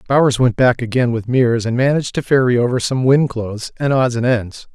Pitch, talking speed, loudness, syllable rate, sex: 125 Hz, 225 wpm, -16 LUFS, 5.8 syllables/s, male